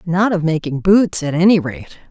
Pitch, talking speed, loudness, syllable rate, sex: 175 Hz, 200 wpm, -15 LUFS, 5.0 syllables/s, female